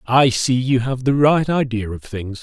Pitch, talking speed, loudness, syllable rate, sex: 125 Hz, 225 wpm, -18 LUFS, 4.4 syllables/s, male